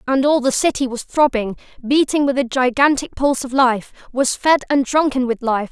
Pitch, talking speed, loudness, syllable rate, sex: 265 Hz, 190 wpm, -17 LUFS, 5.2 syllables/s, female